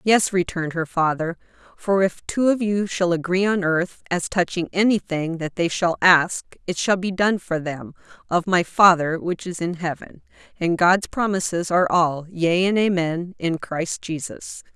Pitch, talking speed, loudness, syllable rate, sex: 175 Hz, 180 wpm, -21 LUFS, 4.5 syllables/s, female